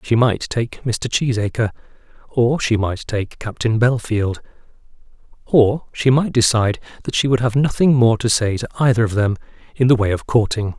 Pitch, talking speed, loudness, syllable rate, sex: 115 Hz, 175 wpm, -18 LUFS, 5.0 syllables/s, male